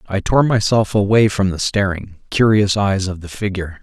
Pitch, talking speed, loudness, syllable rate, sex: 100 Hz, 190 wpm, -17 LUFS, 5.0 syllables/s, male